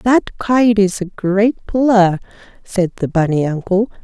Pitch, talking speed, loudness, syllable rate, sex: 200 Hz, 150 wpm, -16 LUFS, 4.0 syllables/s, female